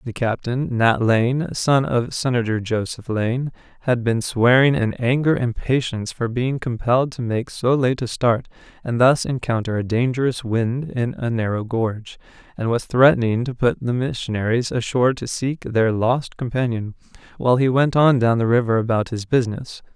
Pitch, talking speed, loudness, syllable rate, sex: 120 Hz, 170 wpm, -20 LUFS, 4.9 syllables/s, male